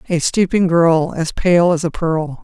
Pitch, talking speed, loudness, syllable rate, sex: 170 Hz, 195 wpm, -16 LUFS, 4.0 syllables/s, female